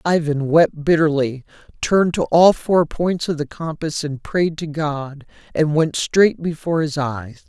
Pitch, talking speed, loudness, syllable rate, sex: 155 Hz, 170 wpm, -19 LUFS, 4.2 syllables/s, male